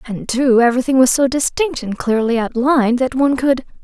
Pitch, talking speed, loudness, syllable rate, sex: 255 Hz, 190 wpm, -16 LUFS, 5.7 syllables/s, female